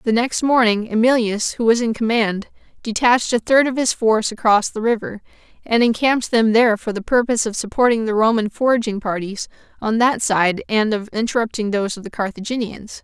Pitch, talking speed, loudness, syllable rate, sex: 225 Hz, 185 wpm, -18 LUFS, 5.7 syllables/s, female